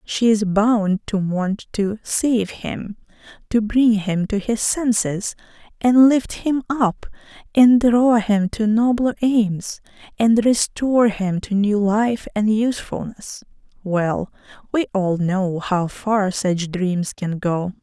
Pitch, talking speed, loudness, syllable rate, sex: 210 Hz, 140 wpm, -19 LUFS, 3.4 syllables/s, female